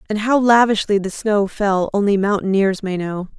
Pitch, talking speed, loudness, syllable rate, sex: 205 Hz, 175 wpm, -17 LUFS, 4.9 syllables/s, female